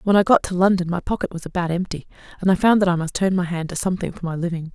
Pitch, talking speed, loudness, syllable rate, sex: 180 Hz, 305 wpm, -21 LUFS, 7.2 syllables/s, female